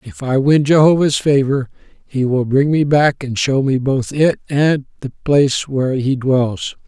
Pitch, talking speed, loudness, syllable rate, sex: 135 Hz, 185 wpm, -15 LUFS, 4.3 syllables/s, male